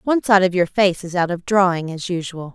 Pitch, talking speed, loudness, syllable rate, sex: 185 Hz, 260 wpm, -18 LUFS, 5.7 syllables/s, female